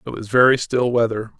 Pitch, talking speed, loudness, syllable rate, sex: 120 Hz, 215 wpm, -18 LUFS, 5.8 syllables/s, male